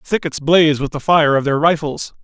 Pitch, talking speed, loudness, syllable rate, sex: 150 Hz, 240 wpm, -15 LUFS, 5.8 syllables/s, male